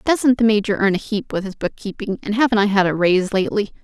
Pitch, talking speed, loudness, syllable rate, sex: 210 Hz, 250 wpm, -19 LUFS, 6.4 syllables/s, female